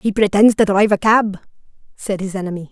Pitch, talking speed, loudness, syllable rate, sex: 200 Hz, 200 wpm, -16 LUFS, 5.9 syllables/s, female